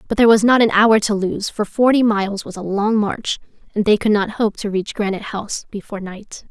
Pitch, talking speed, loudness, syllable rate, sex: 210 Hz, 240 wpm, -18 LUFS, 5.8 syllables/s, female